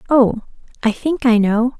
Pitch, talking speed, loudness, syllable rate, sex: 240 Hz, 165 wpm, -16 LUFS, 4.6 syllables/s, female